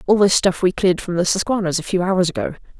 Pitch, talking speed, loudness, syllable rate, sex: 180 Hz, 260 wpm, -18 LUFS, 6.7 syllables/s, female